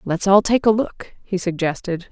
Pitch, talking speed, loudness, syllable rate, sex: 190 Hz, 200 wpm, -19 LUFS, 4.7 syllables/s, female